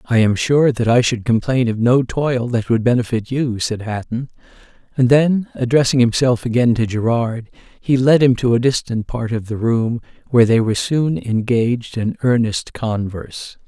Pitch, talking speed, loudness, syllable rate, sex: 120 Hz, 180 wpm, -17 LUFS, 4.8 syllables/s, male